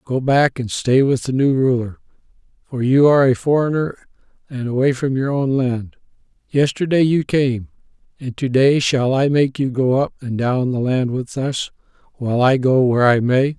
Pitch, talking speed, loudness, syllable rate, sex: 130 Hz, 190 wpm, -17 LUFS, 4.8 syllables/s, male